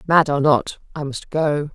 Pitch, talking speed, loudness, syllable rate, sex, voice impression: 145 Hz, 205 wpm, -20 LUFS, 4.2 syllables/s, female, very feminine, very adult-like, thin, tensed, powerful, slightly dark, hard, clear, slightly fluent, slightly raspy, cool, intellectual, very refreshing, sincere, calm, friendly, reassuring, unique, elegant, wild, slightly sweet, lively, slightly strict, slightly intense, slightly sharp, light